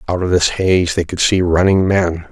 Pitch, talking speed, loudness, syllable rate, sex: 90 Hz, 235 wpm, -15 LUFS, 4.8 syllables/s, male